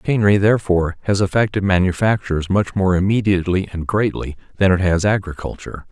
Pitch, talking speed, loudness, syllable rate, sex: 95 Hz, 140 wpm, -18 LUFS, 6.3 syllables/s, male